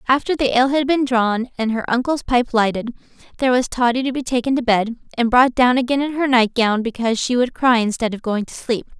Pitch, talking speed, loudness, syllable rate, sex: 245 Hz, 240 wpm, -18 LUFS, 5.9 syllables/s, female